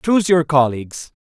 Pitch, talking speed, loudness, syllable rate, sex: 150 Hz, 145 wpm, -16 LUFS, 5.4 syllables/s, male